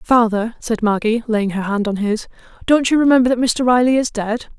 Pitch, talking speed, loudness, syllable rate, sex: 230 Hz, 210 wpm, -17 LUFS, 5.2 syllables/s, female